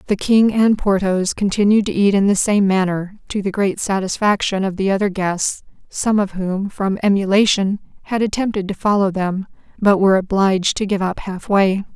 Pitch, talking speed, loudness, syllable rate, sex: 195 Hz, 180 wpm, -17 LUFS, 5.1 syllables/s, female